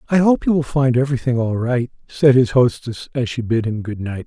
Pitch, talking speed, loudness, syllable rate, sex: 125 Hz, 240 wpm, -18 LUFS, 5.5 syllables/s, male